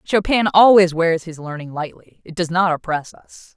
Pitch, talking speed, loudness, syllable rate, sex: 175 Hz, 185 wpm, -17 LUFS, 4.7 syllables/s, female